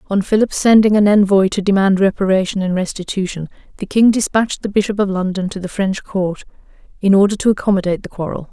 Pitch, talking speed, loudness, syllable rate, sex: 195 Hz, 190 wpm, -16 LUFS, 6.3 syllables/s, female